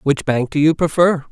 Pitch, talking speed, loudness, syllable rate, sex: 150 Hz, 230 wpm, -16 LUFS, 5.1 syllables/s, male